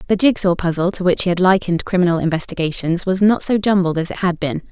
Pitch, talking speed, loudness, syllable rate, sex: 180 Hz, 240 wpm, -17 LUFS, 6.5 syllables/s, female